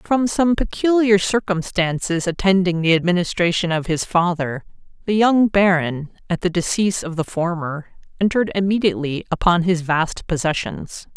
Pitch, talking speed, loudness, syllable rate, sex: 180 Hz, 135 wpm, -19 LUFS, 5.0 syllables/s, female